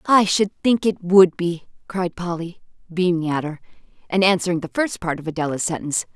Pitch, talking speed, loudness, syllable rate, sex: 180 Hz, 185 wpm, -20 LUFS, 5.4 syllables/s, female